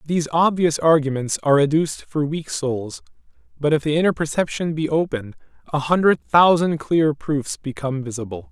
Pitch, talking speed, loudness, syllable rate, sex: 150 Hz, 155 wpm, -20 LUFS, 5.3 syllables/s, male